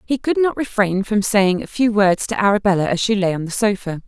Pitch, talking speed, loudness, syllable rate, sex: 205 Hz, 250 wpm, -18 LUFS, 5.6 syllables/s, female